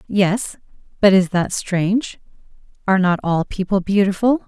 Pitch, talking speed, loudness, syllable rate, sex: 195 Hz, 120 wpm, -18 LUFS, 4.7 syllables/s, female